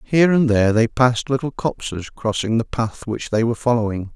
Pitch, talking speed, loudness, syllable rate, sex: 120 Hz, 200 wpm, -19 LUFS, 5.8 syllables/s, male